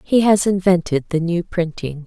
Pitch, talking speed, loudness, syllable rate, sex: 175 Hz, 175 wpm, -18 LUFS, 4.6 syllables/s, female